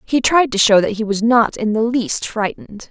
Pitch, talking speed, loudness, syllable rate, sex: 220 Hz, 250 wpm, -16 LUFS, 5.0 syllables/s, female